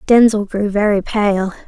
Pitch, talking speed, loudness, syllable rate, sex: 205 Hz, 145 wpm, -15 LUFS, 4.2 syllables/s, female